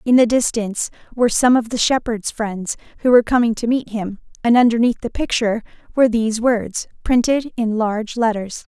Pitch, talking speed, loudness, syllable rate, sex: 230 Hz, 180 wpm, -18 LUFS, 5.7 syllables/s, female